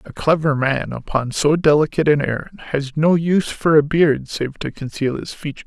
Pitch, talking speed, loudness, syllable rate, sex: 150 Hz, 200 wpm, -19 LUFS, 5.2 syllables/s, male